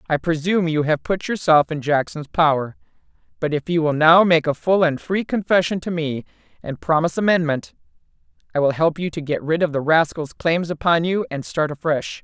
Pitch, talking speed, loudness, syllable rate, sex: 160 Hz, 200 wpm, -20 LUFS, 5.4 syllables/s, female